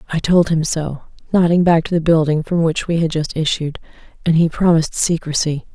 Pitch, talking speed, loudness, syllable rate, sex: 160 Hz, 200 wpm, -17 LUFS, 5.5 syllables/s, female